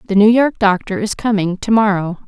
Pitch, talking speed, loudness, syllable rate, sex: 205 Hz, 210 wpm, -15 LUFS, 5.4 syllables/s, female